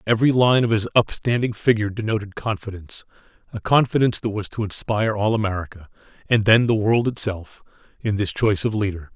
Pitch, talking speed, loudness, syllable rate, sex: 105 Hz, 165 wpm, -21 LUFS, 6.2 syllables/s, male